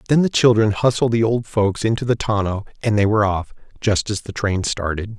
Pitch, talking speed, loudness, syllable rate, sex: 105 Hz, 220 wpm, -19 LUFS, 5.5 syllables/s, male